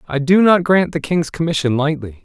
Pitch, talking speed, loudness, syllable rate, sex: 155 Hz, 215 wpm, -16 LUFS, 5.3 syllables/s, male